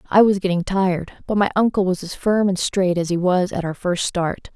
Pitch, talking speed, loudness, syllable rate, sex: 185 Hz, 250 wpm, -20 LUFS, 5.3 syllables/s, female